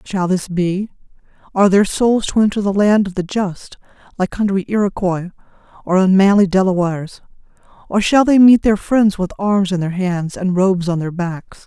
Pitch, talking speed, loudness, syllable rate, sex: 190 Hz, 180 wpm, -16 LUFS, 5.0 syllables/s, female